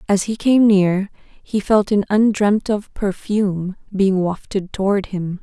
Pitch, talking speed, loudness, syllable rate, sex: 200 Hz, 155 wpm, -18 LUFS, 3.9 syllables/s, female